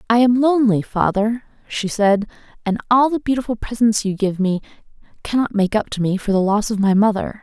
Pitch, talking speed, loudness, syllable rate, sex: 215 Hz, 200 wpm, -18 LUFS, 5.6 syllables/s, female